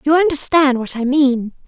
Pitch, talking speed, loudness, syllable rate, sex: 275 Hz, 180 wpm, -16 LUFS, 4.8 syllables/s, female